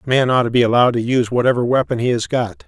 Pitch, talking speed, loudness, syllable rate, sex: 120 Hz, 290 wpm, -16 LUFS, 7.5 syllables/s, male